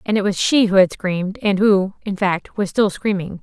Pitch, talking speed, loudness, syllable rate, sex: 195 Hz, 245 wpm, -18 LUFS, 4.9 syllables/s, female